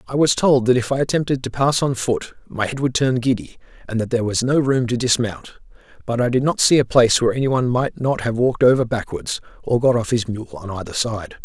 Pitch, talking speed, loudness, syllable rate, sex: 125 Hz, 250 wpm, -19 LUFS, 6.0 syllables/s, male